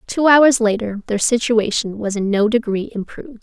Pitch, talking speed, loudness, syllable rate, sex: 225 Hz, 175 wpm, -17 LUFS, 5.1 syllables/s, female